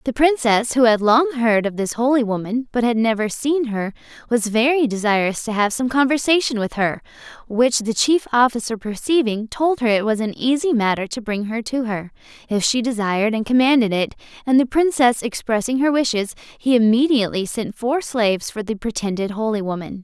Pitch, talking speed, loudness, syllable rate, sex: 235 Hz, 190 wpm, -19 LUFS, 5.3 syllables/s, female